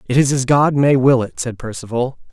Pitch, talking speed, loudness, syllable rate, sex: 130 Hz, 235 wpm, -16 LUFS, 5.4 syllables/s, male